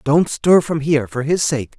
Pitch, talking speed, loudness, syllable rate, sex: 145 Hz, 235 wpm, -17 LUFS, 4.7 syllables/s, male